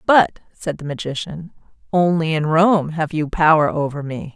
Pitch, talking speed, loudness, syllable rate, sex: 160 Hz, 165 wpm, -19 LUFS, 4.7 syllables/s, female